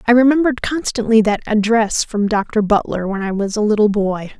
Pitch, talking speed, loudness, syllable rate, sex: 215 Hz, 190 wpm, -16 LUFS, 5.3 syllables/s, female